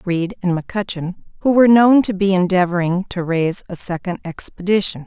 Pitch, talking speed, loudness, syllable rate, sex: 190 Hz, 165 wpm, -17 LUFS, 5.8 syllables/s, female